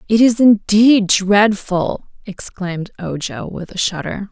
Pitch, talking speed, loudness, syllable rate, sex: 205 Hz, 125 wpm, -16 LUFS, 3.9 syllables/s, female